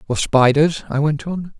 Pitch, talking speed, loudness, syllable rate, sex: 150 Hz, 190 wpm, -17 LUFS, 4.4 syllables/s, male